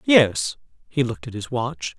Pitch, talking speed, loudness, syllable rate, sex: 125 Hz, 180 wpm, -23 LUFS, 4.5 syllables/s, female